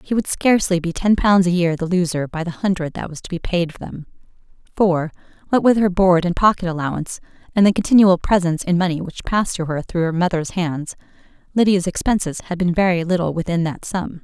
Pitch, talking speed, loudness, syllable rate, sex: 180 Hz, 210 wpm, -19 LUFS, 5.8 syllables/s, female